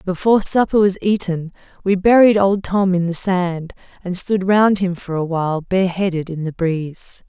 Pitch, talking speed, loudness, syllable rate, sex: 185 Hz, 190 wpm, -17 LUFS, 4.8 syllables/s, female